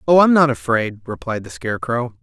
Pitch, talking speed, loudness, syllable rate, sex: 125 Hz, 190 wpm, -18 LUFS, 5.7 syllables/s, male